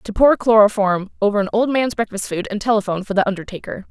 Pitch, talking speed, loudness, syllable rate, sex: 210 Hz, 215 wpm, -18 LUFS, 6.6 syllables/s, female